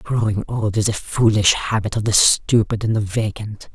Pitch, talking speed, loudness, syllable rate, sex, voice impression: 105 Hz, 190 wpm, -18 LUFS, 4.7 syllables/s, female, slightly feminine, very gender-neutral, very middle-aged, slightly old, slightly thin, slightly relaxed, slightly dark, very soft, clear, fluent, very intellectual, very sincere, very calm, mature, friendly, very reassuring, elegant, slightly sweet, kind, slightly modest